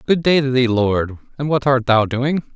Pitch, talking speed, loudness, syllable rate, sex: 130 Hz, 235 wpm, -17 LUFS, 4.5 syllables/s, male